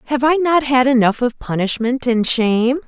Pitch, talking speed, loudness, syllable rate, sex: 250 Hz, 190 wpm, -16 LUFS, 5.0 syllables/s, female